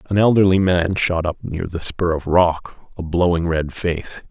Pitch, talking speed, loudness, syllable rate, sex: 85 Hz, 195 wpm, -19 LUFS, 4.2 syllables/s, male